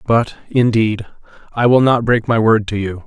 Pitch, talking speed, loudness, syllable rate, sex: 110 Hz, 195 wpm, -15 LUFS, 4.7 syllables/s, male